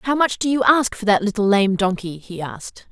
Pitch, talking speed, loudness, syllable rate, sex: 215 Hz, 245 wpm, -19 LUFS, 5.2 syllables/s, female